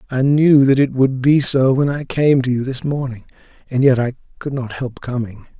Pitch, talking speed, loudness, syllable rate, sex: 130 Hz, 225 wpm, -17 LUFS, 5.0 syllables/s, male